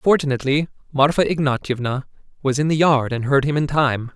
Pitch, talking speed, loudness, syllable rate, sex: 140 Hz, 175 wpm, -19 LUFS, 5.7 syllables/s, male